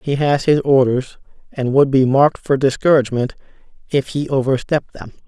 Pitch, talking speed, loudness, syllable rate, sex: 135 Hz, 160 wpm, -16 LUFS, 5.5 syllables/s, male